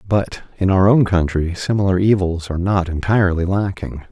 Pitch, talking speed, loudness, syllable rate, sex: 90 Hz, 160 wpm, -17 LUFS, 5.3 syllables/s, male